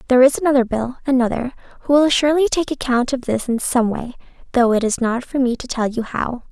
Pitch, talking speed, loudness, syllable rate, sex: 250 Hz, 230 wpm, -18 LUFS, 6.0 syllables/s, female